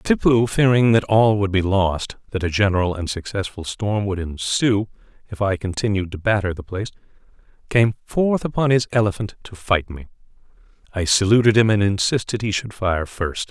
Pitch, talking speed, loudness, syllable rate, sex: 100 Hz, 175 wpm, -20 LUFS, 5.2 syllables/s, male